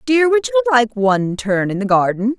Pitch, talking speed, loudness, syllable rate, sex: 230 Hz, 225 wpm, -16 LUFS, 5.3 syllables/s, female